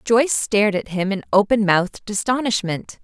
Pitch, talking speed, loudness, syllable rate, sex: 210 Hz, 160 wpm, -19 LUFS, 5.3 syllables/s, female